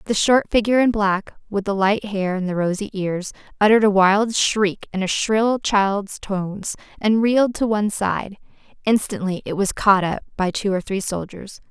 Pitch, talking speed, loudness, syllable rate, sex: 205 Hz, 190 wpm, -20 LUFS, 4.8 syllables/s, female